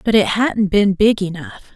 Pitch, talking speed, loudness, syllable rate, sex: 200 Hz, 205 wpm, -16 LUFS, 5.1 syllables/s, female